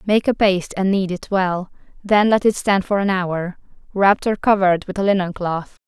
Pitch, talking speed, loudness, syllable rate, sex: 195 Hz, 215 wpm, -18 LUFS, 5.2 syllables/s, female